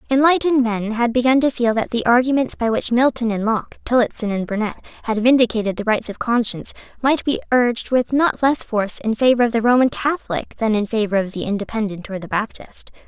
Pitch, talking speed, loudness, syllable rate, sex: 230 Hz, 205 wpm, -19 LUFS, 6.1 syllables/s, female